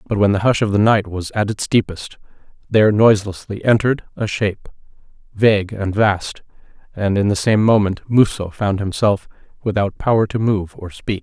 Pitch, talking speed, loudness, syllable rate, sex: 105 Hz, 175 wpm, -17 LUFS, 5.2 syllables/s, male